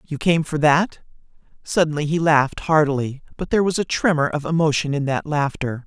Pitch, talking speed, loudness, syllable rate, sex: 155 Hz, 185 wpm, -20 LUFS, 5.6 syllables/s, male